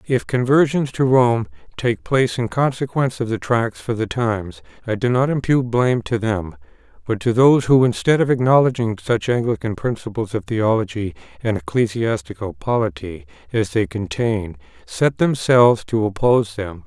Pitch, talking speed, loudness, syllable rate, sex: 120 Hz, 155 wpm, -19 LUFS, 5.1 syllables/s, male